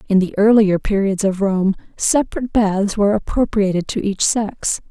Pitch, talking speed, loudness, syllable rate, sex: 205 Hz, 160 wpm, -17 LUFS, 5.0 syllables/s, female